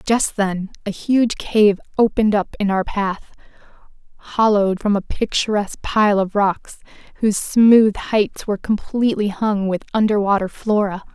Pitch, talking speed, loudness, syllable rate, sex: 205 Hz, 140 wpm, -18 LUFS, 4.7 syllables/s, female